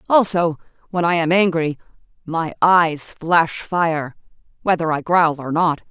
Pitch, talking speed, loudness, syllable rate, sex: 165 Hz, 140 wpm, -18 LUFS, 4.0 syllables/s, female